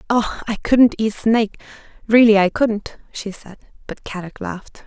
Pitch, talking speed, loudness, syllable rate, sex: 215 Hz, 160 wpm, -18 LUFS, 5.0 syllables/s, female